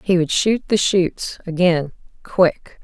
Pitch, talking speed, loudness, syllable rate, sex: 175 Hz, 125 wpm, -18 LUFS, 3.9 syllables/s, female